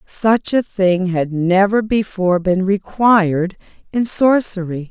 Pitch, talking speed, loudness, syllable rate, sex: 195 Hz, 120 wpm, -16 LUFS, 3.8 syllables/s, female